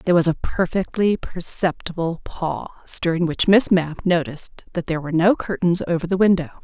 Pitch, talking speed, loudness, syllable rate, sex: 175 Hz, 170 wpm, -21 LUFS, 5.6 syllables/s, female